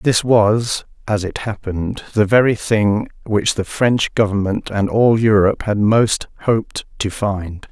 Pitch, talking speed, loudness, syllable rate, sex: 105 Hz, 155 wpm, -17 LUFS, 4.1 syllables/s, male